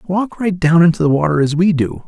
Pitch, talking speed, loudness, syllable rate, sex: 170 Hz, 260 wpm, -14 LUFS, 5.4 syllables/s, male